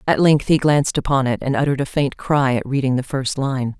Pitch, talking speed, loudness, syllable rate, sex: 135 Hz, 255 wpm, -19 LUFS, 5.8 syllables/s, female